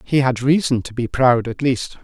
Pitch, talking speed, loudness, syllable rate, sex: 125 Hz, 235 wpm, -18 LUFS, 4.7 syllables/s, male